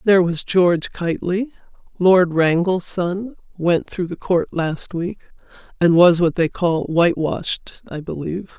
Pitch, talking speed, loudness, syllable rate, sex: 175 Hz, 145 wpm, -19 LUFS, 4.4 syllables/s, female